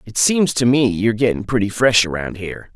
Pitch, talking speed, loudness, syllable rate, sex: 110 Hz, 220 wpm, -17 LUFS, 5.7 syllables/s, male